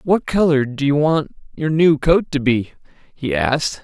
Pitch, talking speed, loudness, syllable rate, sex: 150 Hz, 190 wpm, -17 LUFS, 4.4 syllables/s, male